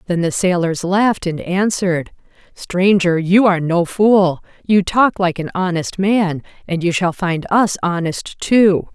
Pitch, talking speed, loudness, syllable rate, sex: 180 Hz, 160 wpm, -16 LUFS, 4.2 syllables/s, female